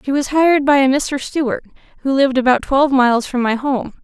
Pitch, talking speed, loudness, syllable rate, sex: 265 Hz, 225 wpm, -16 LUFS, 6.1 syllables/s, female